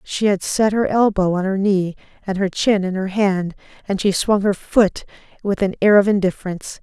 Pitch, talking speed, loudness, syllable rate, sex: 195 Hz, 210 wpm, -18 LUFS, 5.1 syllables/s, female